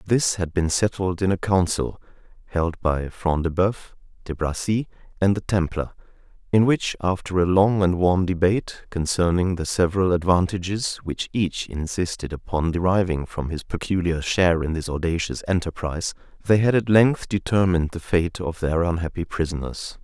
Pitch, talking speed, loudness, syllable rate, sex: 90 Hz, 160 wpm, -23 LUFS, 4.9 syllables/s, male